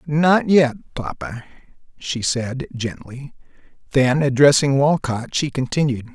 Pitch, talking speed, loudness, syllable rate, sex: 135 Hz, 105 wpm, -19 LUFS, 3.9 syllables/s, male